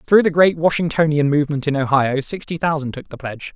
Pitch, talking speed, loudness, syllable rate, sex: 150 Hz, 200 wpm, -18 LUFS, 6.2 syllables/s, male